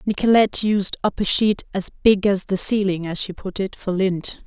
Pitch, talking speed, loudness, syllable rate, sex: 195 Hz, 215 wpm, -20 LUFS, 4.9 syllables/s, female